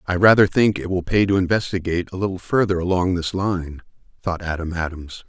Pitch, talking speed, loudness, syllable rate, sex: 90 Hz, 195 wpm, -20 LUFS, 5.8 syllables/s, male